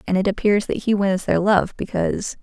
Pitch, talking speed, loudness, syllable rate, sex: 200 Hz, 225 wpm, -20 LUFS, 5.4 syllables/s, female